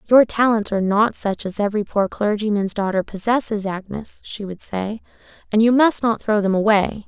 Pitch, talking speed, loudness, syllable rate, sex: 210 Hz, 185 wpm, -19 LUFS, 5.2 syllables/s, female